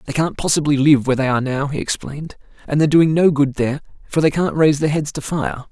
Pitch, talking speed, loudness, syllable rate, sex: 145 Hz, 250 wpm, -17 LUFS, 6.6 syllables/s, male